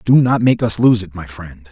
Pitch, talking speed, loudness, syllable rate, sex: 105 Hz, 280 wpm, -14 LUFS, 5.0 syllables/s, male